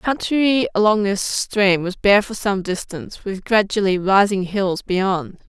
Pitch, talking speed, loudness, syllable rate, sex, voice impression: 200 Hz, 160 wpm, -18 LUFS, 4.2 syllables/s, female, feminine, adult-like, tensed, powerful, bright, slightly muffled, slightly halting, slightly intellectual, friendly, lively, sharp